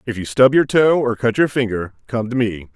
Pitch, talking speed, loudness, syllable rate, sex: 115 Hz, 260 wpm, -17 LUFS, 5.4 syllables/s, male